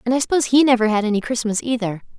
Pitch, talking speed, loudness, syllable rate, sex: 235 Hz, 245 wpm, -18 LUFS, 7.9 syllables/s, female